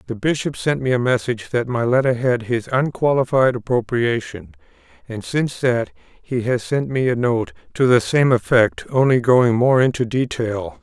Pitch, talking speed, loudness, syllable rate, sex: 125 Hz, 170 wpm, -19 LUFS, 4.7 syllables/s, male